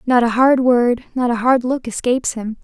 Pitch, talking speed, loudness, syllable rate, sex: 245 Hz, 230 wpm, -16 LUFS, 4.9 syllables/s, female